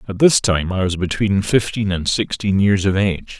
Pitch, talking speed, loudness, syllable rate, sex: 100 Hz, 210 wpm, -18 LUFS, 5.0 syllables/s, male